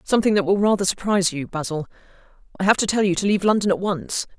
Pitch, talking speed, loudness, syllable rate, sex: 195 Hz, 235 wpm, -21 LUFS, 7.2 syllables/s, female